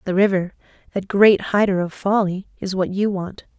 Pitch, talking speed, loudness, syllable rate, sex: 195 Hz, 185 wpm, -20 LUFS, 4.9 syllables/s, female